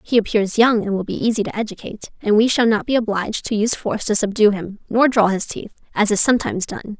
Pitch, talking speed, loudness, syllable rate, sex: 215 Hz, 250 wpm, -18 LUFS, 6.4 syllables/s, female